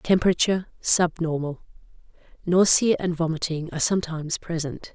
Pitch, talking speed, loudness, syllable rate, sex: 170 Hz, 95 wpm, -23 LUFS, 5.5 syllables/s, female